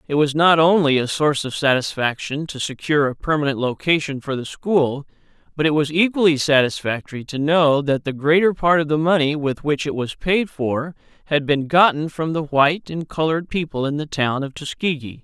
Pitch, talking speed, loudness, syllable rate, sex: 150 Hz, 195 wpm, -19 LUFS, 5.3 syllables/s, male